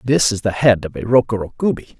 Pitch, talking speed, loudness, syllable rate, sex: 115 Hz, 240 wpm, -17 LUFS, 5.9 syllables/s, male